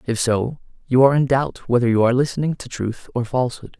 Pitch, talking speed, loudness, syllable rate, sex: 125 Hz, 220 wpm, -20 LUFS, 6.2 syllables/s, male